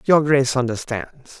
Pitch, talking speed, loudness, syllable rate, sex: 130 Hz, 130 wpm, -19 LUFS, 4.7 syllables/s, male